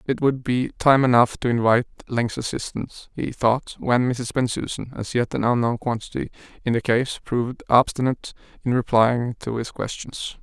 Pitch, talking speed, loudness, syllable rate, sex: 120 Hz, 155 wpm, -22 LUFS, 5.0 syllables/s, male